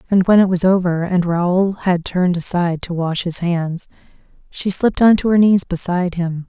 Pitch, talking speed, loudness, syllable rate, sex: 180 Hz, 205 wpm, -17 LUFS, 5.1 syllables/s, female